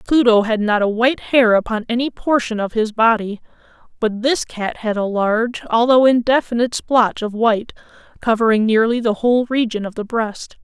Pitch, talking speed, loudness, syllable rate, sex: 230 Hz, 175 wpm, -17 LUFS, 5.3 syllables/s, female